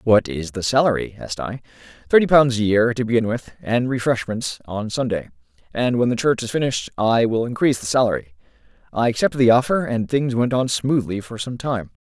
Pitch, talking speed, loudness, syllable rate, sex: 115 Hz, 200 wpm, -20 LUFS, 5.8 syllables/s, male